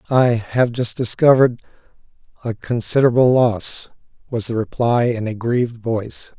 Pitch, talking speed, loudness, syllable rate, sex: 120 Hz, 130 wpm, -18 LUFS, 4.9 syllables/s, male